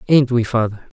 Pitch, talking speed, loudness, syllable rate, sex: 120 Hz, 180 wpm, -18 LUFS, 5.3 syllables/s, male